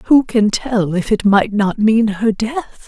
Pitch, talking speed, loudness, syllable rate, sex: 215 Hz, 210 wpm, -15 LUFS, 3.5 syllables/s, female